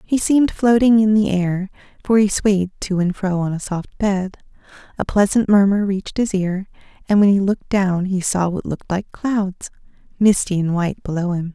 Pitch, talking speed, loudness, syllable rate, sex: 195 Hz, 195 wpm, -18 LUFS, 5.0 syllables/s, female